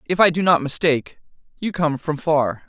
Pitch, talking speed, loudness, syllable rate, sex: 160 Hz, 200 wpm, -20 LUFS, 5.1 syllables/s, male